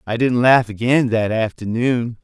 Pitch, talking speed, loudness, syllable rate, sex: 115 Hz, 160 wpm, -17 LUFS, 4.4 syllables/s, male